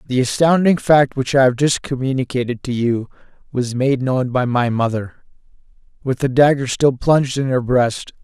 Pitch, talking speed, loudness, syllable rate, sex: 130 Hz, 175 wpm, -17 LUFS, 4.9 syllables/s, male